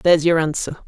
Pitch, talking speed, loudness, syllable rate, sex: 160 Hz, 205 wpm, -18 LUFS, 7.1 syllables/s, female